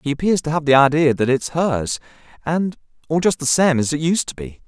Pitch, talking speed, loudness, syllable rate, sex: 150 Hz, 255 wpm, -18 LUFS, 5.8 syllables/s, male